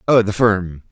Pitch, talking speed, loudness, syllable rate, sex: 100 Hz, 195 wpm, -17 LUFS, 4.3 syllables/s, male